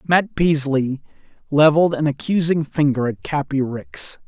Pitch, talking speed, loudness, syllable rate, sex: 145 Hz, 125 wpm, -19 LUFS, 4.4 syllables/s, male